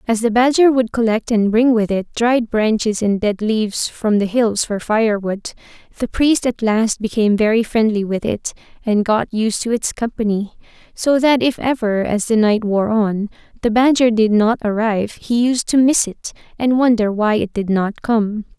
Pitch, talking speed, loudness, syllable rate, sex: 220 Hz, 195 wpm, -17 LUFS, 4.7 syllables/s, female